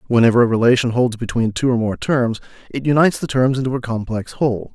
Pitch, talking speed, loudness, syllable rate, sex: 120 Hz, 215 wpm, -18 LUFS, 6.3 syllables/s, male